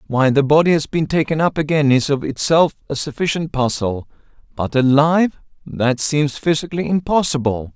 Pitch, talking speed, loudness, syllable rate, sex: 145 Hz, 145 wpm, -17 LUFS, 5.2 syllables/s, male